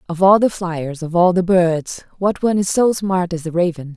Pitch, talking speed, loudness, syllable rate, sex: 180 Hz, 240 wpm, -17 LUFS, 5.0 syllables/s, female